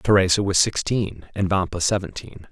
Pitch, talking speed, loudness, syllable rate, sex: 95 Hz, 145 wpm, -21 LUFS, 5.0 syllables/s, male